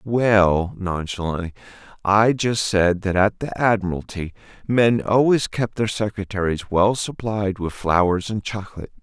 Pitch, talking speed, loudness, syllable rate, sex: 100 Hz, 135 wpm, -21 LUFS, 4.3 syllables/s, male